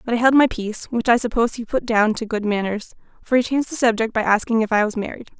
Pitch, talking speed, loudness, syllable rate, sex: 230 Hz, 280 wpm, -20 LUFS, 6.7 syllables/s, female